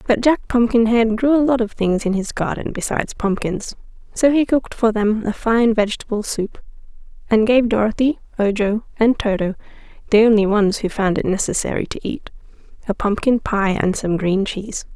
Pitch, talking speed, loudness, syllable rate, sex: 220 Hz, 175 wpm, -18 LUFS, 5.2 syllables/s, female